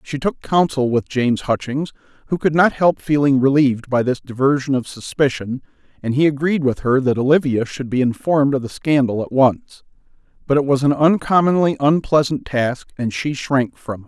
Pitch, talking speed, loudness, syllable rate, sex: 135 Hz, 190 wpm, -18 LUFS, 5.2 syllables/s, male